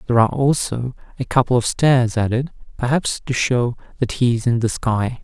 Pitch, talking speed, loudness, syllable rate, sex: 125 Hz, 195 wpm, -19 LUFS, 5.3 syllables/s, male